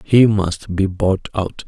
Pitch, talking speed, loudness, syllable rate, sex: 100 Hz, 180 wpm, -18 LUFS, 3.3 syllables/s, male